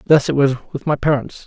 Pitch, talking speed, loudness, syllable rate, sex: 140 Hz, 245 wpm, -18 LUFS, 6.2 syllables/s, male